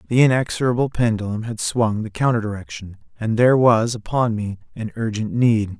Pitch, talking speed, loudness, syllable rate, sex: 110 Hz, 165 wpm, -20 LUFS, 5.4 syllables/s, male